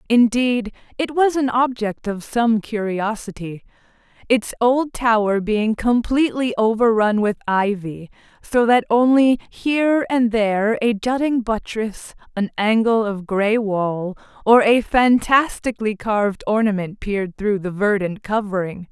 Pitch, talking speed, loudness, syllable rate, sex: 220 Hz, 125 wpm, -19 LUFS, 4.2 syllables/s, female